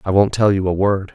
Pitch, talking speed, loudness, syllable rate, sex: 100 Hz, 315 wpm, -17 LUFS, 5.7 syllables/s, male